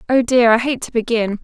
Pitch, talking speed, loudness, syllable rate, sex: 235 Hz, 250 wpm, -16 LUFS, 5.7 syllables/s, female